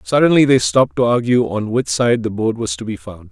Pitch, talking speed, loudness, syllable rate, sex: 120 Hz, 255 wpm, -16 LUFS, 5.5 syllables/s, male